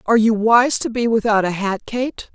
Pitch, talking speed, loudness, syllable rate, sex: 220 Hz, 230 wpm, -17 LUFS, 5.1 syllables/s, female